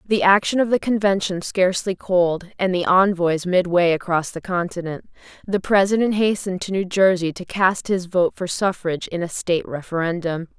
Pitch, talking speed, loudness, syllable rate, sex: 185 Hz, 175 wpm, -20 LUFS, 5.2 syllables/s, female